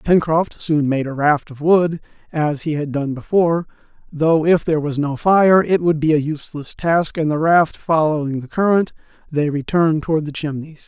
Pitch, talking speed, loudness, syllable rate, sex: 155 Hz, 195 wpm, -18 LUFS, 5.0 syllables/s, male